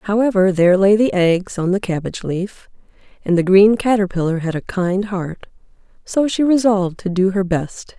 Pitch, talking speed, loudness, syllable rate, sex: 195 Hz, 180 wpm, -17 LUFS, 5.0 syllables/s, female